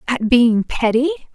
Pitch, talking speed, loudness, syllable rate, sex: 255 Hz, 135 wpm, -16 LUFS, 4.3 syllables/s, female